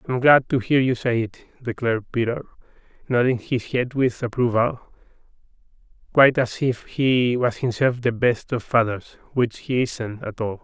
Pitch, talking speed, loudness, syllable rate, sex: 120 Hz, 165 wpm, -22 LUFS, 4.6 syllables/s, male